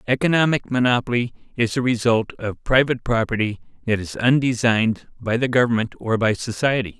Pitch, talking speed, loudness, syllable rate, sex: 115 Hz, 145 wpm, -20 LUFS, 5.7 syllables/s, male